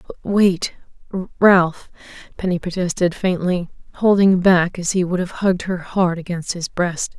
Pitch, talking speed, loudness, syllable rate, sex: 180 Hz, 140 wpm, -19 LUFS, 4.6 syllables/s, female